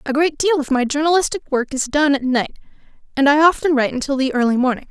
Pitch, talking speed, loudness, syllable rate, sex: 285 Hz, 235 wpm, -17 LUFS, 6.5 syllables/s, female